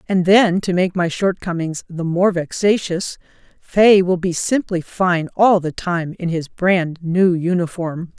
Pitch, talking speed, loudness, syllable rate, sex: 180 Hz, 160 wpm, -18 LUFS, 3.9 syllables/s, female